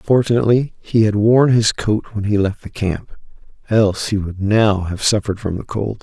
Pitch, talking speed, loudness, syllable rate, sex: 105 Hz, 200 wpm, -17 LUFS, 5.0 syllables/s, male